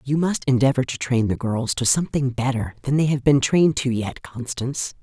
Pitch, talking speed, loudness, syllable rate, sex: 130 Hz, 215 wpm, -21 LUFS, 5.5 syllables/s, female